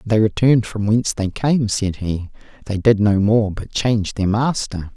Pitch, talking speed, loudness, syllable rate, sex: 110 Hz, 195 wpm, -18 LUFS, 4.7 syllables/s, male